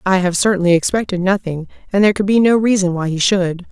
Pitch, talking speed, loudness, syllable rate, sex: 190 Hz, 225 wpm, -15 LUFS, 6.2 syllables/s, female